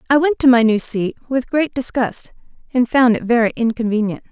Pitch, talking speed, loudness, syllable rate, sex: 245 Hz, 195 wpm, -17 LUFS, 5.3 syllables/s, female